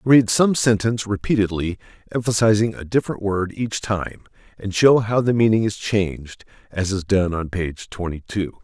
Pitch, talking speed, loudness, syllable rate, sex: 105 Hz, 165 wpm, -20 LUFS, 4.9 syllables/s, male